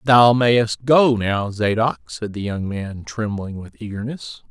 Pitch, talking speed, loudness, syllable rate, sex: 110 Hz, 160 wpm, -19 LUFS, 3.8 syllables/s, male